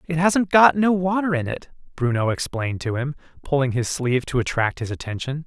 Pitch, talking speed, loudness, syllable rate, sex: 145 Hz, 200 wpm, -21 LUFS, 5.7 syllables/s, male